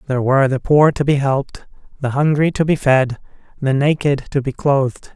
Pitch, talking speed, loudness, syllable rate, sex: 140 Hz, 200 wpm, -17 LUFS, 5.5 syllables/s, male